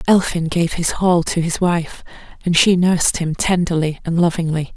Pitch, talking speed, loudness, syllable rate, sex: 170 Hz, 175 wpm, -17 LUFS, 4.8 syllables/s, female